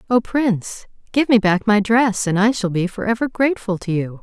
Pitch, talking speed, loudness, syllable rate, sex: 215 Hz, 225 wpm, -18 LUFS, 5.3 syllables/s, female